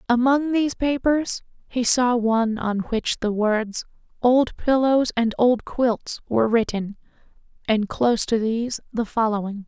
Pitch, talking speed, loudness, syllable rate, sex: 235 Hz, 145 wpm, -22 LUFS, 4.3 syllables/s, female